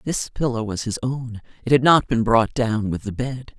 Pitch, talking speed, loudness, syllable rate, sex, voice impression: 120 Hz, 235 wpm, -21 LUFS, 4.7 syllables/s, female, feminine, very adult-like, slightly cool, intellectual, calm